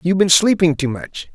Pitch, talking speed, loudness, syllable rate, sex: 165 Hz, 225 wpm, -15 LUFS, 5.8 syllables/s, male